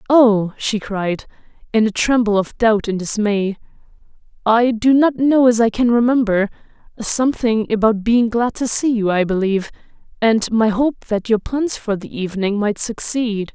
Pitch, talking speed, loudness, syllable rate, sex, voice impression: 220 Hz, 170 wpm, -17 LUFS, 4.6 syllables/s, female, feminine, adult-like, slightly powerful, clear, fluent, intellectual, calm, lively, sharp